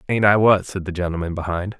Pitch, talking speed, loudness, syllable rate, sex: 95 Hz, 235 wpm, -20 LUFS, 6.2 syllables/s, male